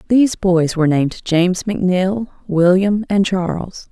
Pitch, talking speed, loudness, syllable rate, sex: 185 Hz, 140 wpm, -16 LUFS, 4.9 syllables/s, female